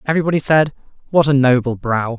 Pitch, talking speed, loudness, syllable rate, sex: 135 Hz, 165 wpm, -16 LUFS, 6.5 syllables/s, male